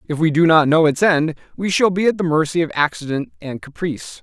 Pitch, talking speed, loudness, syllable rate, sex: 160 Hz, 240 wpm, -17 LUFS, 5.7 syllables/s, male